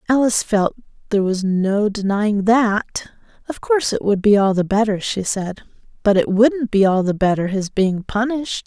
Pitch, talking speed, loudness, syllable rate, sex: 210 Hz, 185 wpm, -18 LUFS, 4.9 syllables/s, female